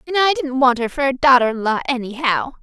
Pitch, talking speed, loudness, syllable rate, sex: 260 Hz, 250 wpm, -17 LUFS, 6.0 syllables/s, female